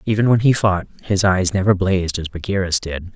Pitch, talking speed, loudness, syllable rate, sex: 95 Hz, 210 wpm, -18 LUFS, 5.6 syllables/s, male